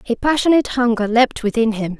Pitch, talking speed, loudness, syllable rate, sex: 235 Hz, 180 wpm, -17 LUFS, 6.1 syllables/s, female